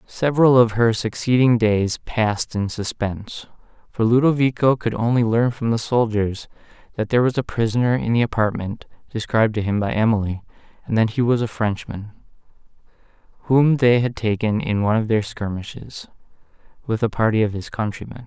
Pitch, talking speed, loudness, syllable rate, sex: 115 Hz, 165 wpm, -20 LUFS, 5.4 syllables/s, male